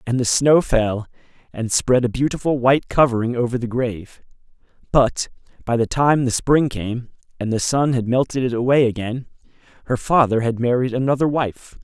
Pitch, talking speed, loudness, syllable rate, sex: 125 Hz, 170 wpm, -19 LUFS, 5.1 syllables/s, male